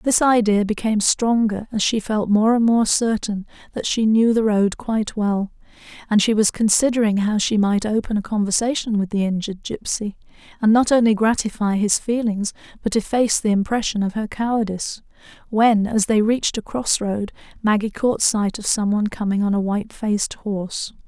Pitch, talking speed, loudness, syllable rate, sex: 215 Hz, 180 wpm, -20 LUFS, 5.3 syllables/s, female